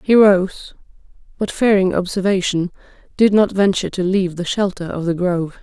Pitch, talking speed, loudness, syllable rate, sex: 190 Hz, 160 wpm, -17 LUFS, 5.4 syllables/s, female